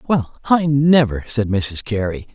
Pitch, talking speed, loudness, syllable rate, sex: 120 Hz, 155 wpm, -18 LUFS, 4.2 syllables/s, male